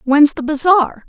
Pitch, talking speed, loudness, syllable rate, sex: 295 Hz, 165 wpm, -14 LUFS, 3.9 syllables/s, female